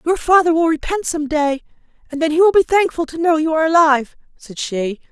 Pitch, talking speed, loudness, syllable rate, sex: 315 Hz, 225 wpm, -16 LUFS, 5.9 syllables/s, female